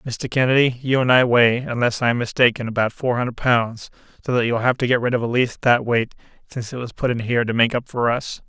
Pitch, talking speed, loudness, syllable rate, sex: 120 Hz, 255 wpm, -19 LUFS, 5.9 syllables/s, male